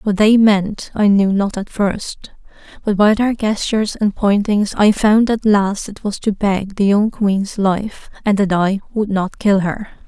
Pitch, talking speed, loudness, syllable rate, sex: 205 Hz, 195 wpm, -16 LUFS, 4.0 syllables/s, female